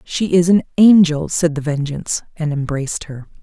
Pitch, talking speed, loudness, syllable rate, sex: 160 Hz, 175 wpm, -16 LUFS, 5.1 syllables/s, female